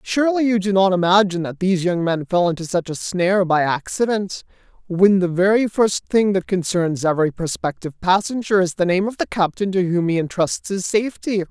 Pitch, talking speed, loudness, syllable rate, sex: 185 Hz, 200 wpm, -19 LUFS, 5.6 syllables/s, male